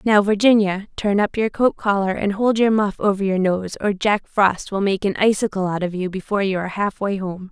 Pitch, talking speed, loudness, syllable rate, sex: 200 Hz, 230 wpm, -20 LUFS, 5.4 syllables/s, female